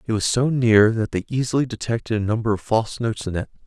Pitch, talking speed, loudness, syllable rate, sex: 115 Hz, 245 wpm, -21 LUFS, 6.4 syllables/s, male